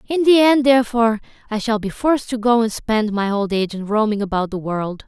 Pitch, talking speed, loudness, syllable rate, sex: 225 Hz, 235 wpm, -18 LUFS, 5.9 syllables/s, female